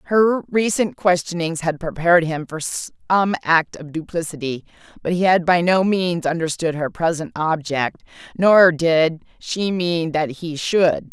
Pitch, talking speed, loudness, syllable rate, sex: 170 Hz, 150 wpm, -19 LUFS, 4.1 syllables/s, female